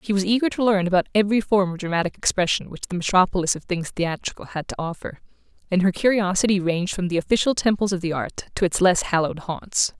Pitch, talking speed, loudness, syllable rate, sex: 190 Hz, 215 wpm, -22 LUFS, 6.6 syllables/s, female